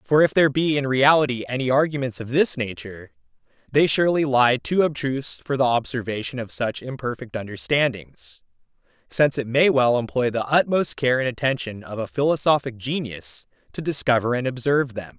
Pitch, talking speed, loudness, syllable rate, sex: 125 Hz, 165 wpm, -22 LUFS, 5.5 syllables/s, male